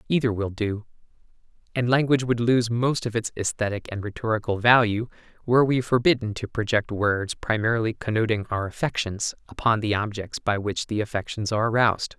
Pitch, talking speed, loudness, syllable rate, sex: 110 Hz, 165 wpm, -24 LUFS, 5.7 syllables/s, male